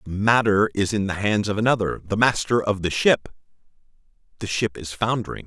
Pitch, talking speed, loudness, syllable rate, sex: 105 Hz, 175 wpm, -22 LUFS, 5.5 syllables/s, male